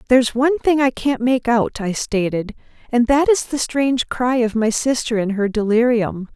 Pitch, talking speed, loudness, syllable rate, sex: 240 Hz, 200 wpm, -18 LUFS, 4.8 syllables/s, female